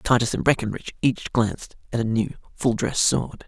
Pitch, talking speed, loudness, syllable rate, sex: 115 Hz, 190 wpm, -23 LUFS, 5.3 syllables/s, male